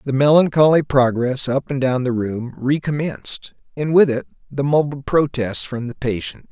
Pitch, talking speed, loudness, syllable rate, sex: 135 Hz, 175 wpm, -19 LUFS, 4.8 syllables/s, male